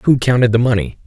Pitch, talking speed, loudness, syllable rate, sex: 115 Hz, 225 wpm, -14 LUFS, 6.1 syllables/s, male